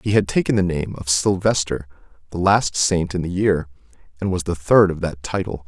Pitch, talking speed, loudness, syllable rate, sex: 90 Hz, 210 wpm, -20 LUFS, 5.1 syllables/s, male